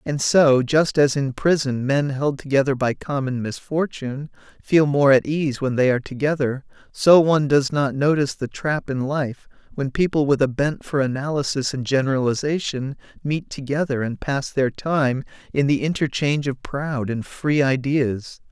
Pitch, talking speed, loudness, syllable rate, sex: 140 Hz, 170 wpm, -21 LUFS, 4.7 syllables/s, male